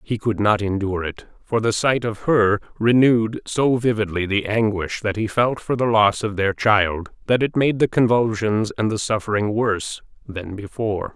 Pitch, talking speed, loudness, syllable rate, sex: 110 Hz, 190 wpm, -20 LUFS, 4.8 syllables/s, male